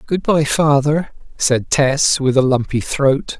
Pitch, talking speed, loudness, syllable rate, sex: 140 Hz, 140 wpm, -16 LUFS, 3.6 syllables/s, male